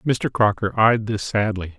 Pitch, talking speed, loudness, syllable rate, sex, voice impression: 110 Hz, 170 wpm, -20 LUFS, 4.4 syllables/s, male, masculine, adult-like, tensed, slightly powerful, slightly hard, clear, cool, intellectual, calm, slightly mature, wild, lively, strict